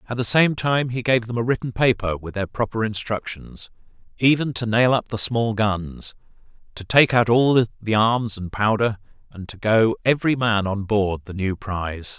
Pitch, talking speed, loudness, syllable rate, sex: 110 Hz, 190 wpm, -21 LUFS, 4.8 syllables/s, male